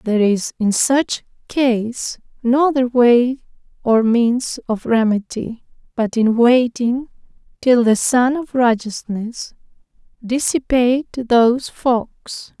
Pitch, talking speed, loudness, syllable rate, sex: 240 Hz, 110 wpm, -17 LUFS, 3.4 syllables/s, female